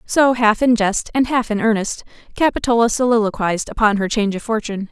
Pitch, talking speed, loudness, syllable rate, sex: 225 Hz, 185 wpm, -17 LUFS, 6.0 syllables/s, female